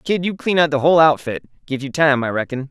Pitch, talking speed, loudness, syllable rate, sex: 145 Hz, 265 wpm, -17 LUFS, 6.2 syllables/s, male